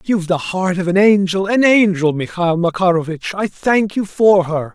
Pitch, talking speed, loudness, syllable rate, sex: 185 Hz, 190 wpm, -15 LUFS, 4.8 syllables/s, male